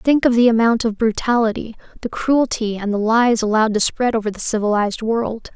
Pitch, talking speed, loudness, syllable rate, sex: 225 Hz, 195 wpm, -18 LUFS, 5.5 syllables/s, female